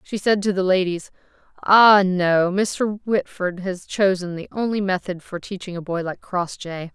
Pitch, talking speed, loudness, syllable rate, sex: 190 Hz, 175 wpm, -21 LUFS, 4.4 syllables/s, female